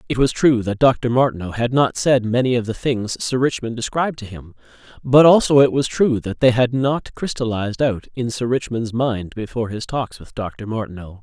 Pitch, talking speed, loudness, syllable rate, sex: 120 Hz, 210 wpm, -19 LUFS, 5.2 syllables/s, male